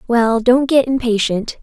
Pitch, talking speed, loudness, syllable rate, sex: 240 Hz, 150 wpm, -15 LUFS, 4.2 syllables/s, female